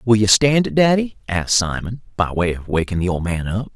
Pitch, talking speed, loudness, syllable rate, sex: 105 Hz, 240 wpm, -18 LUFS, 5.5 syllables/s, male